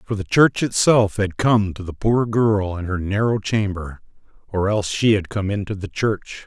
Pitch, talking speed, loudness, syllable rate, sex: 100 Hz, 205 wpm, -20 LUFS, 4.6 syllables/s, male